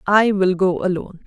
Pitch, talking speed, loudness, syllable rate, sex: 190 Hz, 190 wpm, -18 LUFS, 5.5 syllables/s, female